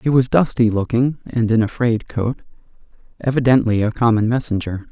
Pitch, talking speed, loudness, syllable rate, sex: 115 Hz, 160 wpm, -18 LUFS, 5.2 syllables/s, male